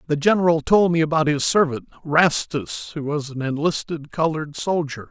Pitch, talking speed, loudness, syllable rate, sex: 155 Hz, 165 wpm, -21 LUFS, 5.1 syllables/s, male